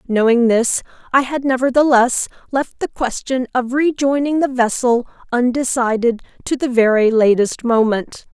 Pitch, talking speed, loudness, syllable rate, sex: 250 Hz, 130 wpm, -16 LUFS, 4.6 syllables/s, female